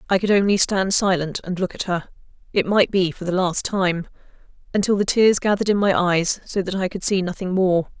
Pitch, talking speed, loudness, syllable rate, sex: 190 Hz, 210 wpm, -20 LUFS, 5.5 syllables/s, female